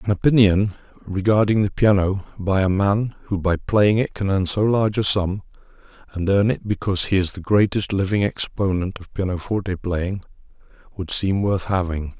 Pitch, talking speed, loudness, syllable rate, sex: 100 Hz, 170 wpm, -20 LUFS, 5.0 syllables/s, male